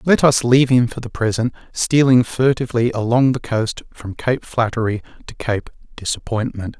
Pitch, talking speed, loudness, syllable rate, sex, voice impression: 120 Hz, 160 wpm, -18 LUFS, 5.0 syllables/s, male, masculine, adult-like, sincere, calm, slightly sweet